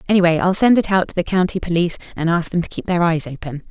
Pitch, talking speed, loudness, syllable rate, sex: 175 Hz, 275 wpm, -18 LUFS, 7.0 syllables/s, female